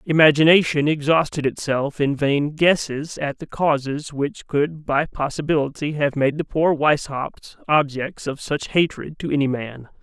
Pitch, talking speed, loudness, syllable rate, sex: 145 Hz, 150 wpm, -20 LUFS, 4.4 syllables/s, male